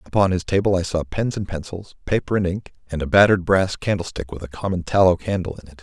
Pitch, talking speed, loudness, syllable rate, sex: 90 Hz, 235 wpm, -21 LUFS, 6.3 syllables/s, male